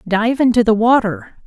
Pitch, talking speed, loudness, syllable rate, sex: 225 Hz, 165 wpm, -14 LUFS, 4.7 syllables/s, female